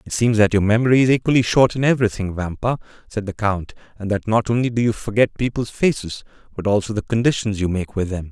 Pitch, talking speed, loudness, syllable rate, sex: 110 Hz, 225 wpm, -19 LUFS, 6.3 syllables/s, male